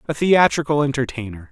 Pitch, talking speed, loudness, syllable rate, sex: 135 Hz, 120 wpm, -18 LUFS, 5.8 syllables/s, male